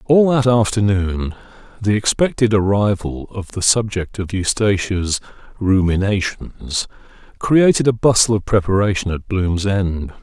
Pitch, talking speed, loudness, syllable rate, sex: 100 Hz, 115 wpm, -17 LUFS, 4.2 syllables/s, male